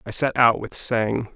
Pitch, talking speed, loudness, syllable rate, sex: 115 Hz, 220 wpm, -21 LUFS, 4.1 syllables/s, male